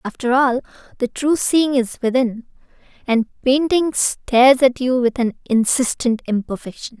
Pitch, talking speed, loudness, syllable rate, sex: 250 Hz, 135 wpm, -18 LUFS, 4.5 syllables/s, female